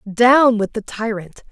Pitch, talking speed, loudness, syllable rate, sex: 225 Hz, 160 wpm, -16 LUFS, 3.7 syllables/s, female